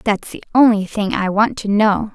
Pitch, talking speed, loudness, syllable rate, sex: 210 Hz, 225 wpm, -16 LUFS, 4.5 syllables/s, female